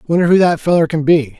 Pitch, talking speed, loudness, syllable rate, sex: 160 Hz, 260 wpm, -13 LUFS, 6.6 syllables/s, male